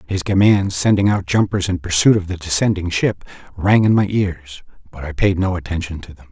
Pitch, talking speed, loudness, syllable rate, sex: 90 Hz, 210 wpm, -17 LUFS, 5.4 syllables/s, male